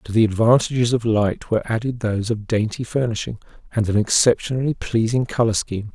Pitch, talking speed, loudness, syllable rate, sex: 115 Hz, 170 wpm, -20 LUFS, 6.0 syllables/s, male